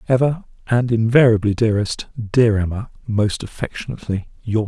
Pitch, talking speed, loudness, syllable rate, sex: 115 Hz, 115 wpm, -19 LUFS, 5.3 syllables/s, male